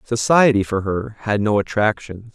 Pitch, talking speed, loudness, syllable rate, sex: 105 Hz, 155 wpm, -18 LUFS, 4.6 syllables/s, male